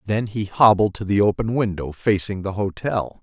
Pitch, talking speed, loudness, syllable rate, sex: 100 Hz, 185 wpm, -21 LUFS, 4.9 syllables/s, male